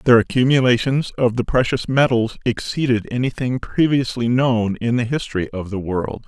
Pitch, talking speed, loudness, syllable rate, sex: 120 Hz, 155 wpm, -19 LUFS, 5.1 syllables/s, male